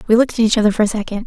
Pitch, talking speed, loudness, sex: 220 Hz, 380 wpm, -16 LUFS, female